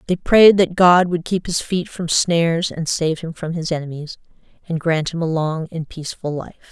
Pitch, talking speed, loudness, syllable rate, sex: 165 Hz, 215 wpm, -18 LUFS, 4.9 syllables/s, female